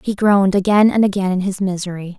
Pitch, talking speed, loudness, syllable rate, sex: 195 Hz, 220 wpm, -16 LUFS, 6.2 syllables/s, female